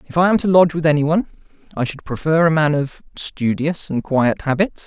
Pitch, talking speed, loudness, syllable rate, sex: 155 Hz, 210 wpm, -18 LUFS, 5.6 syllables/s, male